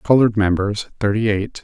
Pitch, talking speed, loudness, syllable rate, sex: 105 Hz, 145 wpm, -18 LUFS, 5.7 syllables/s, male